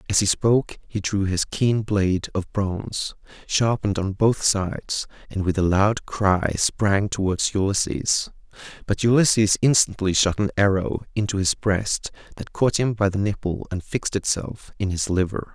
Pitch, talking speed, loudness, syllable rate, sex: 100 Hz, 165 wpm, -22 LUFS, 4.6 syllables/s, male